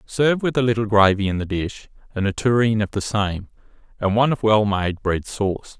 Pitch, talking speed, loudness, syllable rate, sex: 105 Hz, 220 wpm, -20 LUFS, 5.5 syllables/s, male